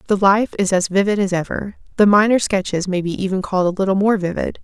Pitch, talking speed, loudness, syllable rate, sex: 195 Hz, 235 wpm, -17 LUFS, 6.3 syllables/s, female